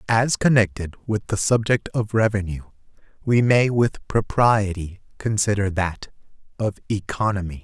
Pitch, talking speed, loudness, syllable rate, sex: 105 Hz, 120 wpm, -21 LUFS, 4.4 syllables/s, male